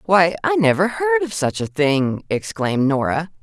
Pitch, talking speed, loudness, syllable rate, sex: 175 Hz, 175 wpm, -19 LUFS, 4.6 syllables/s, female